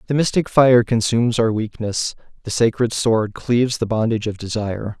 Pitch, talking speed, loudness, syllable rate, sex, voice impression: 115 Hz, 170 wpm, -19 LUFS, 5.3 syllables/s, male, very masculine, very adult-like, thick, tensed, slightly powerful, slightly dark, soft, slightly muffled, fluent, slightly raspy, cool, intellectual, slightly refreshing, sincere, very calm, slightly mature, friendly, reassuring, slightly unique, slightly elegant, slightly wild, sweet, slightly lively, slightly kind, modest